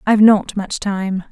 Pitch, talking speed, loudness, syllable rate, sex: 200 Hz, 185 wpm, -16 LUFS, 4.3 syllables/s, female